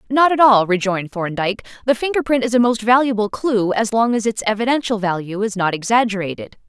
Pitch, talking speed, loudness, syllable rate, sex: 220 Hz, 200 wpm, -18 LUFS, 6.0 syllables/s, female